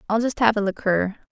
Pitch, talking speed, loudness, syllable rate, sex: 215 Hz, 230 wpm, -21 LUFS, 5.7 syllables/s, female